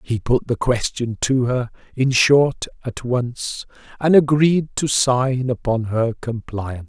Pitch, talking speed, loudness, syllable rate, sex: 125 Hz, 150 wpm, -19 LUFS, 3.8 syllables/s, male